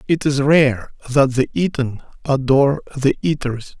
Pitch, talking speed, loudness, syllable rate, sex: 135 Hz, 140 wpm, -18 LUFS, 4.4 syllables/s, male